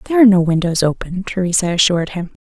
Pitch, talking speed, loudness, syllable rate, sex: 185 Hz, 200 wpm, -15 LUFS, 7.3 syllables/s, female